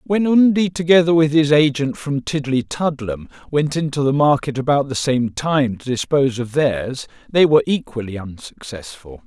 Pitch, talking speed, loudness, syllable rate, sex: 140 Hz, 155 wpm, -18 LUFS, 4.8 syllables/s, male